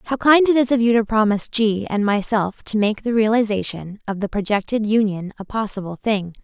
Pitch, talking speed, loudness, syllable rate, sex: 215 Hz, 205 wpm, -19 LUFS, 5.3 syllables/s, female